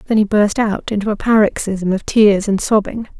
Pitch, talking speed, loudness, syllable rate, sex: 205 Hz, 205 wpm, -15 LUFS, 5.1 syllables/s, female